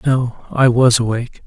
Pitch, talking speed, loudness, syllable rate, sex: 125 Hz, 125 wpm, -16 LUFS, 4.7 syllables/s, male